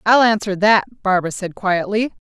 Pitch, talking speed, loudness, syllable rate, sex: 200 Hz, 155 wpm, -17 LUFS, 5.3 syllables/s, female